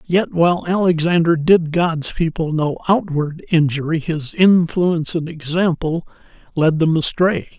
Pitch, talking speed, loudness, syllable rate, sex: 165 Hz, 125 wpm, -17 LUFS, 4.3 syllables/s, male